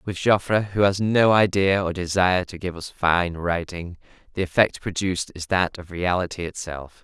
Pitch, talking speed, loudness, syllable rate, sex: 90 Hz, 180 wpm, -22 LUFS, 4.9 syllables/s, male